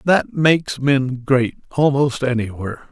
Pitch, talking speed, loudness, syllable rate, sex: 130 Hz, 125 wpm, -18 LUFS, 4.1 syllables/s, male